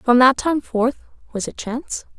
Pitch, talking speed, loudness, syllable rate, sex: 255 Hz, 190 wpm, -20 LUFS, 4.6 syllables/s, female